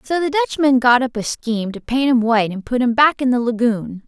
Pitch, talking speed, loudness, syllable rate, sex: 245 Hz, 265 wpm, -17 LUFS, 5.8 syllables/s, female